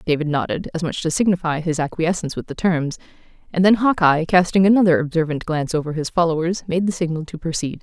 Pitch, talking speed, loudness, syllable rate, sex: 165 Hz, 200 wpm, -19 LUFS, 6.3 syllables/s, female